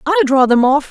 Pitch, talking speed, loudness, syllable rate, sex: 285 Hz, 265 wpm, -12 LUFS, 6.2 syllables/s, female